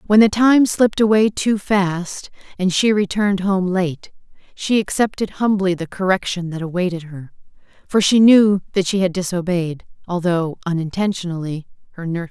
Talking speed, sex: 145 wpm, female